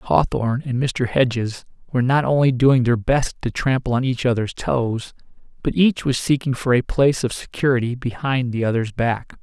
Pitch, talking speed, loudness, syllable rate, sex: 125 Hz, 185 wpm, -20 LUFS, 4.9 syllables/s, male